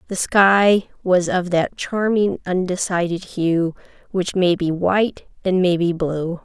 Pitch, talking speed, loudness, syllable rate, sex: 180 Hz, 150 wpm, -19 LUFS, 3.8 syllables/s, female